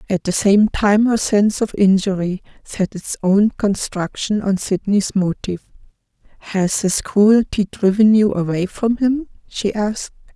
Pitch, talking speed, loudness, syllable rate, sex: 205 Hz, 145 wpm, -17 LUFS, 4.3 syllables/s, female